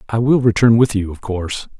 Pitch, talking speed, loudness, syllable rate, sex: 110 Hz, 235 wpm, -16 LUFS, 5.8 syllables/s, male